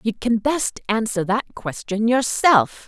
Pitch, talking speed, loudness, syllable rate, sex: 225 Hz, 145 wpm, -20 LUFS, 3.9 syllables/s, female